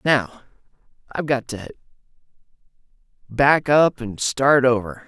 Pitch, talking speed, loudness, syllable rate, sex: 130 Hz, 105 wpm, -19 LUFS, 4.1 syllables/s, male